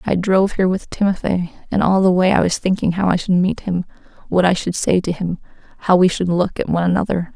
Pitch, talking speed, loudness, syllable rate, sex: 180 Hz, 245 wpm, -18 LUFS, 6.2 syllables/s, female